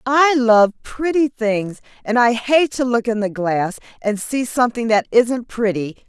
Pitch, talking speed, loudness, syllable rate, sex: 235 Hz, 180 wpm, -18 LUFS, 4.2 syllables/s, female